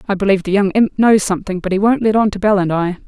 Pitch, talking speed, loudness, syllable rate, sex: 200 Hz, 310 wpm, -15 LUFS, 7.2 syllables/s, female